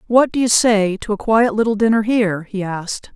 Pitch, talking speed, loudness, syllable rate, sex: 215 Hz, 230 wpm, -17 LUFS, 5.5 syllables/s, female